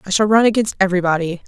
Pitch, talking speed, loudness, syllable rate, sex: 195 Hz, 205 wpm, -16 LUFS, 7.6 syllables/s, female